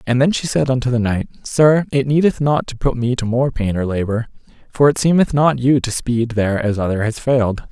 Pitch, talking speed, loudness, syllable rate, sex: 125 Hz, 240 wpm, -17 LUFS, 5.4 syllables/s, male